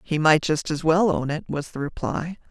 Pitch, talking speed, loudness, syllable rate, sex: 160 Hz, 240 wpm, -23 LUFS, 4.9 syllables/s, female